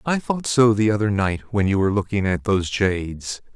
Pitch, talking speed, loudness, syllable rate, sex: 105 Hz, 220 wpm, -21 LUFS, 5.4 syllables/s, male